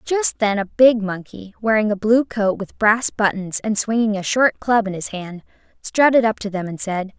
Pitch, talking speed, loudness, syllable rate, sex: 210 Hz, 215 wpm, -19 LUFS, 4.7 syllables/s, female